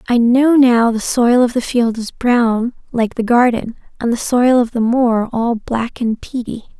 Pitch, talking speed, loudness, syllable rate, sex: 235 Hz, 205 wpm, -15 LUFS, 4.1 syllables/s, female